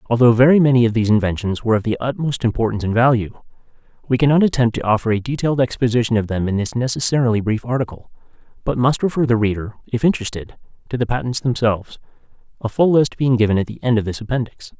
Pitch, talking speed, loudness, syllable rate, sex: 120 Hz, 205 wpm, -18 LUFS, 7.0 syllables/s, male